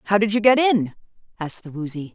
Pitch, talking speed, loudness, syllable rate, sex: 195 Hz, 225 wpm, -21 LUFS, 6.6 syllables/s, female